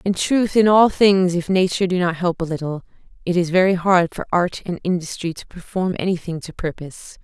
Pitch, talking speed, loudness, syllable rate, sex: 180 Hz, 205 wpm, -19 LUFS, 5.5 syllables/s, female